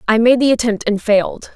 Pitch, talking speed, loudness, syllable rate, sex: 225 Hz, 230 wpm, -15 LUFS, 5.8 syllables/s, female